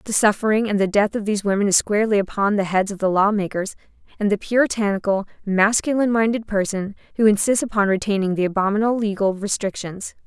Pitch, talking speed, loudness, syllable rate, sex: 205 Hz, 175 wpm, -20 LUFS, 6.4 syllables/s, female